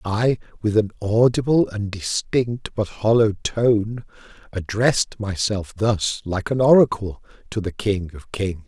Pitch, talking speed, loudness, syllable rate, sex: 105 Hz, 145 wpm, -21 LUFS, 3.8 syllables/s, male